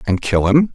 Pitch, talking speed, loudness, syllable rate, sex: 120 Hz, 240 wpm, -16 LUFS, 4.9 syllables/s, male